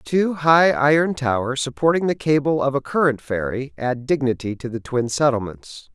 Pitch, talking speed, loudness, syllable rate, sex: 130 Hz, 170 wpm, -20 LUFS, 4.8 syllables/s, male